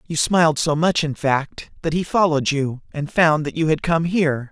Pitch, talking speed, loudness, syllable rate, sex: 155 Hz, 225 wpm, -19 LUFS, 5.1 syllables/s, male